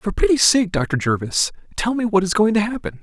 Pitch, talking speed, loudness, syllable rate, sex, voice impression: 190 Hz, 240 wpm, -19 LUFS, 5.5 syllables/s, male, very masculine, adult-like, slightly thick, slightly tensed, powerful, bright, slightly soft, clear, fluent, raspy, cool, very intellectual, very refreshing, sincere, slightly calm, mature, friendly, reassuring, very unique, slightly elegant, wild, slightly sweet, very lively, strict, slightly intense, slightly sharp